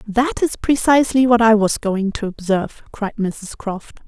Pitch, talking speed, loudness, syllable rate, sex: 220 Hz, 175 wpm, -18 LUFS, 4.6 syllables/s, female